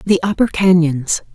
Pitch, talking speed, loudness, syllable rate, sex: 175 Hz, 135 wpm, -15 LUFS, 4.5 syllables/s, female